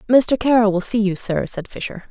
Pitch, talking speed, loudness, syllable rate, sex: 215 Hz, 230 wpm, -19 LUFS, 5.3 syllables/s, female